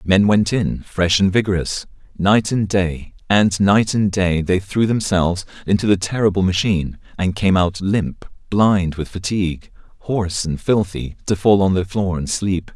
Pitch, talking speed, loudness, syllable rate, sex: 95 Hz, 175 wpm, -18 LUFS, 4.5 syllables/s, male